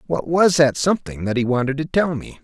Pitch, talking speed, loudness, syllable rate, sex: 145 Hz, 245 wpm, -19 LUFS, 5.7 syllables/s, male